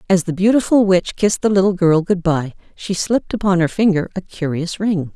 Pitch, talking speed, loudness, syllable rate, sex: 185 Hz, 210 wpm, -17 LUFS, 5.5 syllables/s, female